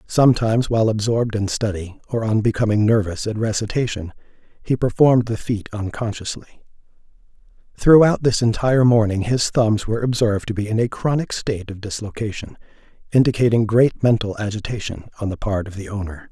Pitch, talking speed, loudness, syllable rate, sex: 110 Hz, 155 wpm, -19 LUFS, 5.8 syllables/s, male